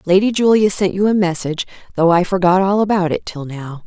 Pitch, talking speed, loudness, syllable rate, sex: 185 Hz, 215 wpm, -16 LUFS, 5.8 syllables/s, female